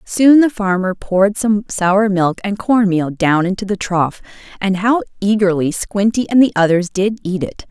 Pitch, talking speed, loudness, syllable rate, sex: 200 Hz, 185 wpm, -15 LUFS, 4.5 syllables/s, female